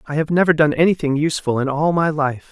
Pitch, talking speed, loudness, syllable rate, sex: 150 Hz, 240 wpm, -18 LUFS, 6.3 syllables/s, male